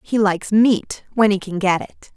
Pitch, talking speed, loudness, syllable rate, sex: 205 Hz, 220 wpm, -18 LUFS, 4.6 syllables/s, female